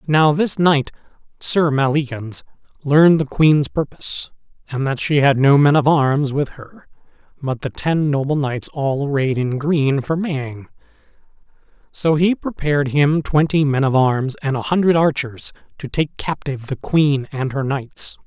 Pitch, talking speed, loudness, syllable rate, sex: 145 Hz, 165 wpm, -18 LUFS, 4.4 syllables/s, male